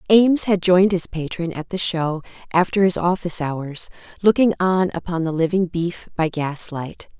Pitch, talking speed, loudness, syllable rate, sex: 175 Hz, 165 wpm, -20 LUFS, 4.9 syllables/s, female